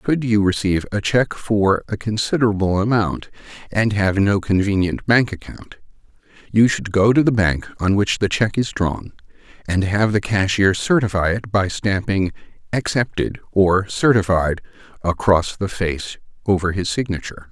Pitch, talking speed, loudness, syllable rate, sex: 100 Hz, 150 wpm, -19 LUFS, 4.7 syllables/s, male